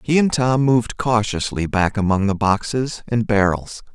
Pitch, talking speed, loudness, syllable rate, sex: 110 Hz, 165 wpm, -19 LUFS, 4.6 syllables/s, male